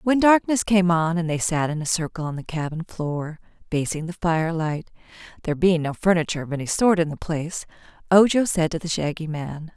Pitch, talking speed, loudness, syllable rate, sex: 170 Hz, 190 wpm, -22 LUFS, 5.6 syllables/s, female